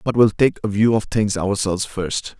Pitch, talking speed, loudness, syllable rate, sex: 105 Hz, 225 wpm, -19 LUFS, 4.9 syllables/s, male